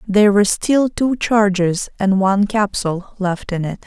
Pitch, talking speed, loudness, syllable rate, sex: 200 Hz, 170 wpm, -17 LUFS, 4.8 syllables/s, female